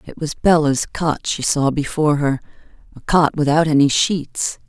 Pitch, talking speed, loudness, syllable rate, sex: 150 Hz, 155 wpm, -18 LUFS, 4.6 syllables/s, female